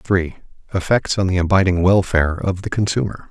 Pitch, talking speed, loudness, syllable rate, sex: 95 Hz, 165 wpm, -18 LUFS, 5.4 syllables/s, male